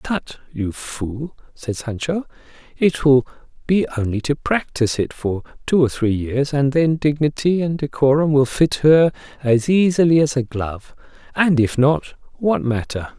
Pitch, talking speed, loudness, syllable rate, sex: 140 Hz, 160 wpm, -19 LUFS, 4.4 syllables/s, male